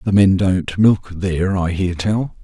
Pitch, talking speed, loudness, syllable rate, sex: 95 Hz, 195 wpm, -17 LUFS, 4.0 syllables/s, male